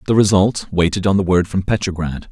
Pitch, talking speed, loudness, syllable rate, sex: 95 Hz, 205 wpm, -17 LUFS, 5.7 syllables/s, male